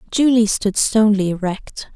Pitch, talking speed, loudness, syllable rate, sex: 210 Hz, 125 wpm, -17 LUFS, 4.6 syllables/s, female